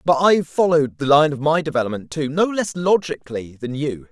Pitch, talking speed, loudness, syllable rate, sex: 150 Hz, 205 wpm, -19 LUFS, 5.8 syllables/s, male